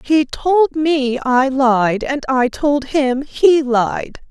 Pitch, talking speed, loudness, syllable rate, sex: 275 Hz, 155 wpm, -16 LUFS, 2.7 syllables/s, female